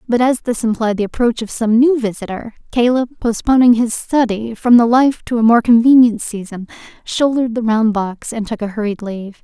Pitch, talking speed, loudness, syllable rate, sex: 230 Hz, 195 wpm, -15 LUFS, 5.2 syllables/s, female